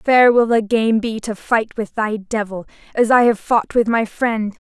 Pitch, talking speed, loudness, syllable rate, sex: 225 Hz, 220 wpm, -17 LUFS, 4.2 syllables/s, female